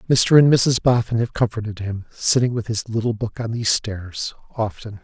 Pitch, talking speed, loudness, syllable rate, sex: 115 Hz, 190 wpm, -20 LUFS, 5.1 syllables/s, male